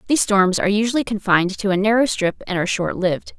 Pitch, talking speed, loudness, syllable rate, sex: 200 Hz, 215 wpm, -19 LUFS, 6.9 syllables/s, female